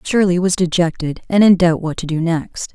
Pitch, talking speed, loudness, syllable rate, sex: 175 Hz, 220 wpm, -16 LUFS, 5.0 syllables/s, female